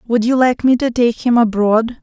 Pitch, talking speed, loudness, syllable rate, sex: 235 Hz, 235 wpm, -14 LUFS, 4.8 syllables/s, female